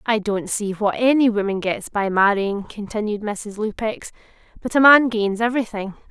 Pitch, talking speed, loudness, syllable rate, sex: 215 Hz, 165 wpm, -20 LUFS, 4.8 syllables/s, female